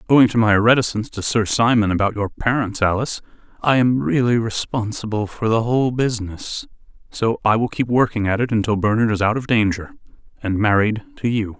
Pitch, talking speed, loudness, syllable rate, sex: 110 Hz, 185 wpm, -19 LUFS, 5.8 syllables/s, male